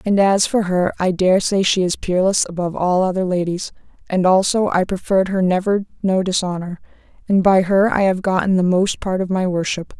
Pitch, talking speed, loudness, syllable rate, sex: 185 Hz, 205 wpm, -18 LUFS, 5.4 syllables/s, female